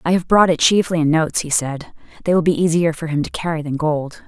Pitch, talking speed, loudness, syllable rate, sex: 165 Hz, 265 wpm, -18 LUFS, 6.0 syllables/s, female